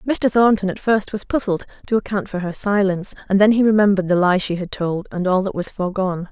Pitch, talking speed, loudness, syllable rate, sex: 195 Hz, 235 wpm, -19 LUFS, 6.2 syllables/s, female